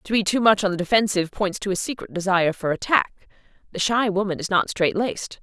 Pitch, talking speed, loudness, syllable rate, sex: 195 Hz, 230 wpm, -22 LUFS, 6.4 syllables/s, female